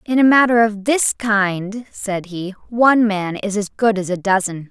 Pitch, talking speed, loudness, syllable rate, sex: 210 Hz, 205 wpm, -17 LUFS, 4.4 syllables/s, female